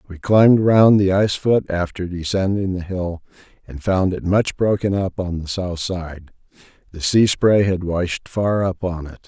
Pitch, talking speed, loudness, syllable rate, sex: 95 Hz, 190 wpm, -19 LUFS, 4.4 syllables/s, male